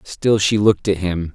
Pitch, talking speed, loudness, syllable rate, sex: 95 Hz, 225 wpm, -17 LUFS, 4.8 syllables/s, male